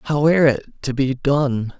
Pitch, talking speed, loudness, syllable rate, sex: 135 Hz, 200 wpm, -19 LUFS, 3.8 syllables/s, male